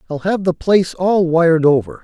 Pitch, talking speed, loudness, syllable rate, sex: 170 Hz, 205 wpm, -15 LUFS, 5.5 syllables/s, male